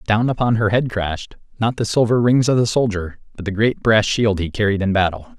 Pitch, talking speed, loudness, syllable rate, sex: 105 Hz, 225 wpm, -18 LUFS, 5.5 syllables/s, male